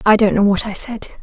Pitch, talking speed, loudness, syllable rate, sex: 210 Hz, 295 wpm, -16 LUFS, 5.9 syllables/s, female